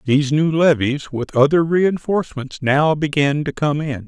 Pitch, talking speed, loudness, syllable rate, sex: 145 Hz, 160 wpm, -18 LUFS, 4.6 syllables/s, male